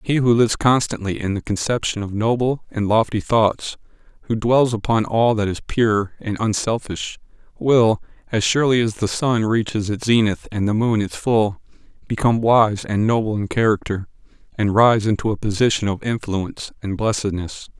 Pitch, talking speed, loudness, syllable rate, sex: 110 Hz, 170 wpm, -19 LUFS, 5.0 syllables/s, male